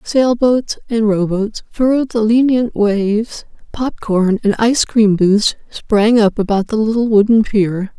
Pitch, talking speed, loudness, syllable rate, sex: 220 Hz, 145 wpm, -14 LUFS, 4.1 syllables/s, female